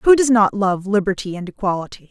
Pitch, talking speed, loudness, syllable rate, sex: 205 Hz, 200 wpm, -18 LUFS, 5.8 syllables/s, female